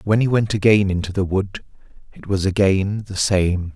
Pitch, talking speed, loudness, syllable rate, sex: 100 Hz, 210 wpm, -19 LUFS, 5.1 syllables/s, male